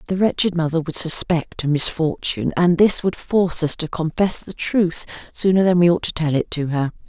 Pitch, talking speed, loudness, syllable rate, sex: 170 Hz, 210 wpm, -19 LUFS, 5.3 syllables/s, female